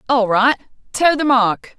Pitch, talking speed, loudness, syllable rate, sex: 245 Hz, 170 wpm, -16 LUFS, 4.1 syllables/s, female